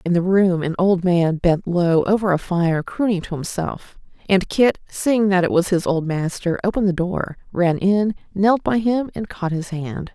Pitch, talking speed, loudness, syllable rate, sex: 185 Hz, 205 wpm, -20 LUFS, 4.4 syllables/s, female